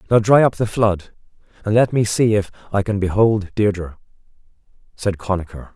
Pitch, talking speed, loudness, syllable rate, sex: 105 Hz, 165 wpm, -18 LUFS, 5.2 syllables/s, male